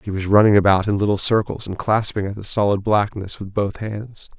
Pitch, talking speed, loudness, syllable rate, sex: 100 Hz, 220 wpm, -19 LUFS, 5.5 syllables/s, male